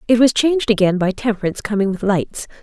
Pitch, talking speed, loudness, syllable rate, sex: 210 Hz, 205 wpm, -17 LUFS, 6.4 syllables/s, female